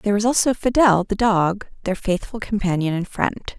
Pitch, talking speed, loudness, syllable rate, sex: 205 Hz, 185 wpm, -20 LUFS, 5.1 syllables/s, female